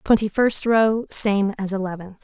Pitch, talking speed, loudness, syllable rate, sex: 205 Hz, 160 wpm, -20 LUFS, 4.4 syllables/s, female